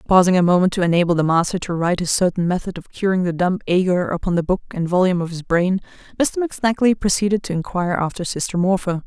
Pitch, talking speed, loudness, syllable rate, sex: 180 Hz, 220 wpm, -19 LUFS, 6.7 syllables/s, female